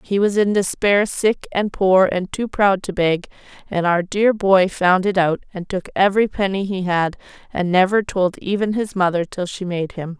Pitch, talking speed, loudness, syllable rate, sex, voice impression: 190 Hz, 205 wpm, -19 LUFS, 4.6 syllables/s, female, feminine, adult-like, intellectual, slightly calm, slightly sharp